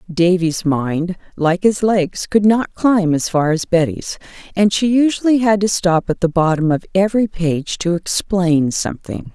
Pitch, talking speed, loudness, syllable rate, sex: 180 Hz, 175 wpm, -16 LUFS, 4.3 syllables/s, female